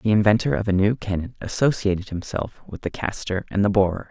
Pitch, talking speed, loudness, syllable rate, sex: 100 Hz, 205 wpm, -23 LUFS, 5.8 syllables/s, male